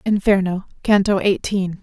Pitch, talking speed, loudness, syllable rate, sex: 195 Hz, 100 wpm, -18 LUFS, 4.6 syllables/s, female